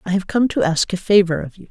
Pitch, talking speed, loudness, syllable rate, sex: 185 Hz, 315 wpm, -18 LUFS, 6.3 syllables/s, female